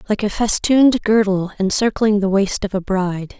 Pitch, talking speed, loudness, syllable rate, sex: 205 Hz, 175 wpm, -17 LUFS, 5.1 syllables/s, female